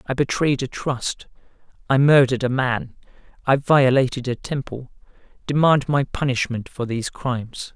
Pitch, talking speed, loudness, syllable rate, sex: 130 Hz, 140 wpm, -21 LUFS, 4.8 syllables/s, male